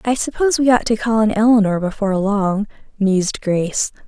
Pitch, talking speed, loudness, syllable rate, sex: 215 Hz, 175 wpm, -17 LUFS, 5.7 syllables/s, female